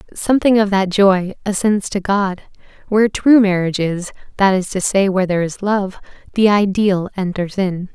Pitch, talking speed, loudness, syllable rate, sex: 195 Hz, 175 wpm, -16 LUFS, 5.1 syllables/s, female